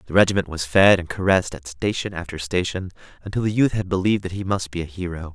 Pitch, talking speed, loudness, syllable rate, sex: 90 Hz, 235 wpm, -22 LUFS, 6.8 syllables/s, male